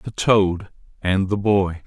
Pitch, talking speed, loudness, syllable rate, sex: 95 Hz, 160 wpm, -20 LUFS, 3.3 syllables/s, male